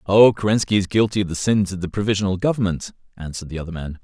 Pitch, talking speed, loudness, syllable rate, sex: 95 Hz, 225 wpm, -20 LUFS, 7.1 syllables/s, male